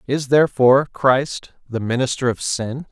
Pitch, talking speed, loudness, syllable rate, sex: 130 Hz, 145 wpm, -18 LUFS, 4.7 syllables/s, male